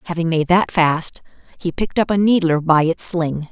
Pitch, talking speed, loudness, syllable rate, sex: 170 Hz, 205 wpm, -17 LUFS, 5.0 syllables/s, female